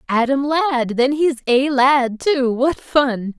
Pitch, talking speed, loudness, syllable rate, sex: 265 Hz, 160 wpm, -17 LUFS, 3.2 syllables/s, female